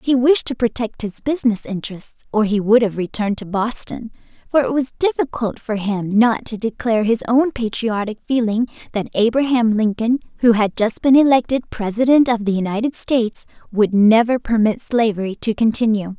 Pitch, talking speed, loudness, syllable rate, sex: 230 Hz, 170 wpm, -18 LUFS, 5.3 syllables/s, female